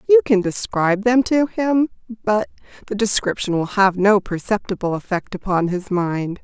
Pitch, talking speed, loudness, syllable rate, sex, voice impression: 205 Hz, 160 wpm, -19 LUFS, 4.6 syllables/s, female, feminine, adult-like, slightly sincere, calm, slightly elegant